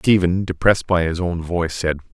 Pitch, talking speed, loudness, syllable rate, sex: 90 Hz, 190 wpm, -19 LUFS, 5.6 syllables/s, male